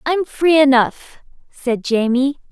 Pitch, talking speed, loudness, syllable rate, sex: 270 Hz, 120 wpm, -16 LUFS, 3.5 syllables/s, female